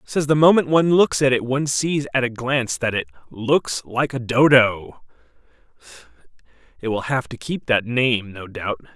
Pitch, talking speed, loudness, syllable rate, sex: 125 Hz, 180 wpm, -19 LUFS, 4.8 syllables/s, male